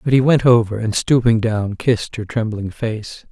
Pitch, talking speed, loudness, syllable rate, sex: 115 Hz, 200 wpm, -17 LUFS, 4.7 syllables/s, male